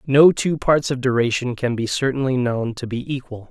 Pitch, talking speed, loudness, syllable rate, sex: 130 Hz, 205 wpm, -20 LUFS, 5.0 syllables/s, male